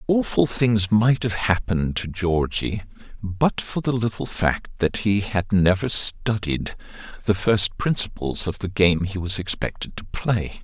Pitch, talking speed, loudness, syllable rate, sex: 100 Hz, 160 wpm, -22 LUFS, 4.1 syllables/s, male